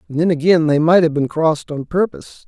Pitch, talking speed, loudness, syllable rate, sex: 160 Hz, 240 wpm, -16 LUFS, 6.2 syllables/s, male